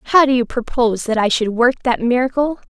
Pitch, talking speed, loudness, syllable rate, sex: 245 Hz, 220 wpm, -17 LUFS, 6.2 syllables/s, female